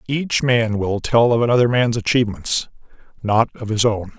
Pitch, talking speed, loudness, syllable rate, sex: 115 Hz, 170 wpm, -18 LUFS, 4.9 syllables/s, male